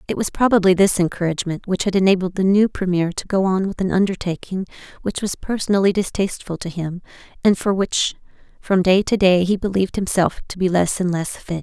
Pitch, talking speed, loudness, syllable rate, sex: 185 Hz, 200 wpm, -19 LUFS, 5.9 syllables/s, female